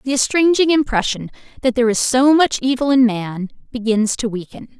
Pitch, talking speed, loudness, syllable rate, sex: 245 Hz, 175 wpm, -16 LUFS, 5.4 syllables/s, female